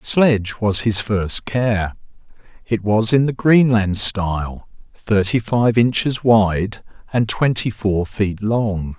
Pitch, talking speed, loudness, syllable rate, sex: 110 Hz, 140 wpm, -17 LUFS, 3.5 syllables/s, male